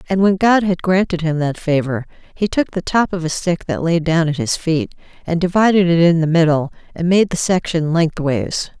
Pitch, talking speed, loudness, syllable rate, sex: 170 Hz, 220 wpm, -17 LUFS, 5.1 syllables/s, female